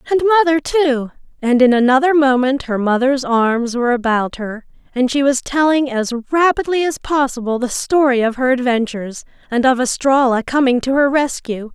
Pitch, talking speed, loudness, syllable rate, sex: 260 Hz, 170 wpm, -16 LUFS, 5.1 syllables/s, female